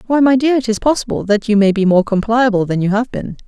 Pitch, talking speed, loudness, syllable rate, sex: 225 Hz, 275 wpm, -14 LUFS, 6.2 syllables/s, female